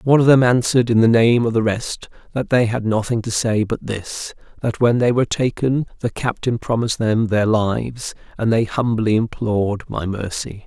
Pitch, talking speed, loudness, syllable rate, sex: 115 Hz, 195 wpm, -19 LUFS, 5.1 syllables/s, male